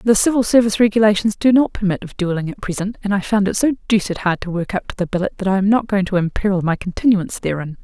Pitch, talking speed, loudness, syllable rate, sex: 200 Hz, 260 wpm, -18 LUFS, 6.7 syllables/s, female